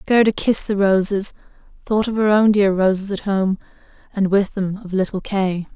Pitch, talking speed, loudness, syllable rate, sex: 200 Hz, 190 wpm, -19 LUFS, 5.2 syllables/s, female